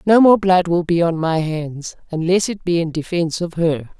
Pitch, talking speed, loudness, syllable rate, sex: 170 Hz, 225 wpm, -18 LUFS, 4.9 syllables/s, female